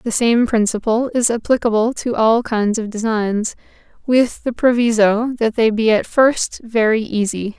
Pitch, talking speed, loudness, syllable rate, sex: 225 Hz, 160 wpm, -17 LUFS, 4.3 syllables/s, female